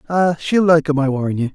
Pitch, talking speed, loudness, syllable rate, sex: 155 Hz, 270 wpm, -16 LUFS, 5.3 syllables/s, male